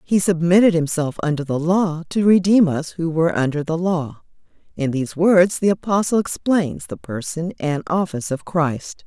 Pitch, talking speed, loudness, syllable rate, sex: 170 Hz, 170 wpm, -19 LUFS, 4.9 syllables/s, female